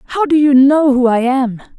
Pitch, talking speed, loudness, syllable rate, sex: 270 Hz, 235 wpm, -12 LUFS, 4.4 syllables/s, female